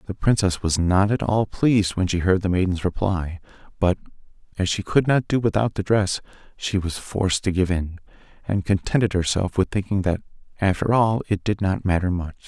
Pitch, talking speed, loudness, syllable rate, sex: 95 Hz, 195 wpm, -22 LUFS, 5.3 syllables/s, male